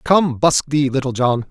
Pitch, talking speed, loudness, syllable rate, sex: 140 Hz, 200 wpm, -17 LUFS, 4.3 syllables/s, male